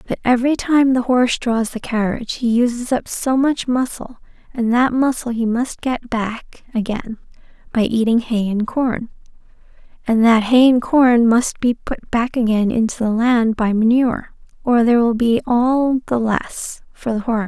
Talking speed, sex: 185 wpm, female